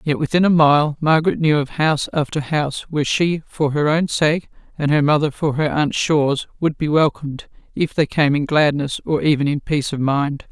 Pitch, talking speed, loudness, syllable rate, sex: 150 Hz, 210 wpm, -18 LUFS, 5.2 syllables/s, female